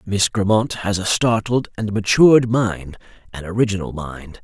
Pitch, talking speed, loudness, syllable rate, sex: 105 Hz, 150 wpm, -18 LUFS, 4.6 syllables/s, male